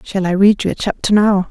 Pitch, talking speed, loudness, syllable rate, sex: 195 Hz, 280 wpm, -15 LUFS, 5.7 syllables/s, female